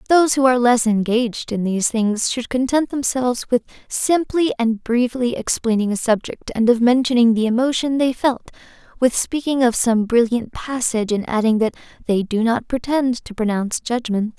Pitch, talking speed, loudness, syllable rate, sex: 240 Hz, 170 wpm, -19 LUFS, 5.2 syllables/s, female